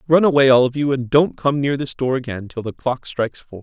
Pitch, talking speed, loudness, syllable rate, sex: 135 Hz, 280 wpm, -18 LUFS, 5.8 syllables/s, male